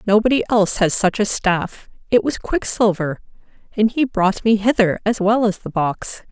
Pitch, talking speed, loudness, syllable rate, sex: 210 Hz, 180 wpm, -18 LUFS, 4.7 syllables/s, female